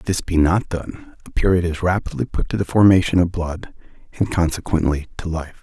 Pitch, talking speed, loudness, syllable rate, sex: 85 Hz, 205 wpm, -20 LUFS, 5.5 syllables/s, male